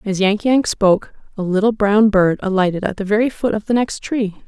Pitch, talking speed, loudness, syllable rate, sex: 205 Hz, 230 wpm, -17 LUFS, 5.4 syllables/s, female